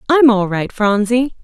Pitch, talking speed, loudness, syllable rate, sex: 230 Hz, 165 wpm, -14 LUFS, 4.2 syllables/s, female